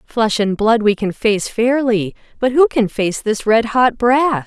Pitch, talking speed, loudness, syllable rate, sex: 225 Hz, 200 wpm, -16 LUFS, 3.9 syllables/s, female